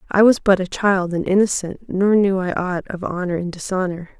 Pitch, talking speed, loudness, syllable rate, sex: 190 Hz, 215 wpm, -19 LUFS, 5.1 syllables/s, female